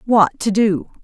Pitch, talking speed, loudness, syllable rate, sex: 205 Hz, 175 wpm, -17 LUFS, 3.8 syllables/s, female